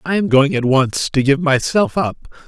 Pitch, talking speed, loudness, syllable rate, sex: 145 Hz, 220 wpm, -16 LUFS, 4.5 syllables/s, male